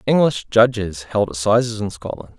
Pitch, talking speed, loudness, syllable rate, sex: 110 Hz, 150 wpm, -18 LUFS, 5.0 syllables/s, male